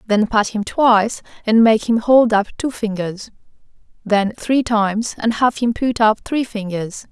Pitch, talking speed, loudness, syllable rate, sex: 220 Hz, 175 wpm, -17 LUFS, 4.3 syllables/s, female